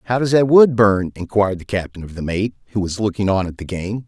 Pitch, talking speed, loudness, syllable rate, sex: 105 Hz, 265 wpm, -18 LUFS, 6.0 syllables/s, male